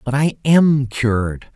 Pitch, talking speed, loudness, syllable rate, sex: 130 Hz, 155 wpm, -17 LUFS, 3.8 syllables/s, male